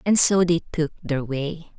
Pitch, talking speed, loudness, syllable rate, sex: 160 Hz, 200 wpm, -22 LUFS, 4.5 syllables/s, female